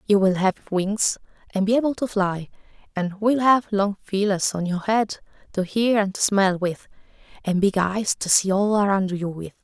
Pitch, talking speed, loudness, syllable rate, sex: 200 Hz, 200 wpm, -22 LUFS, 4.7 syllables/s, female